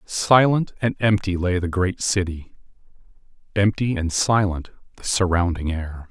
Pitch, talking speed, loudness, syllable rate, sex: 95 Hz, 120 wpm, -21 LUFS, 4.3 syllables/s, male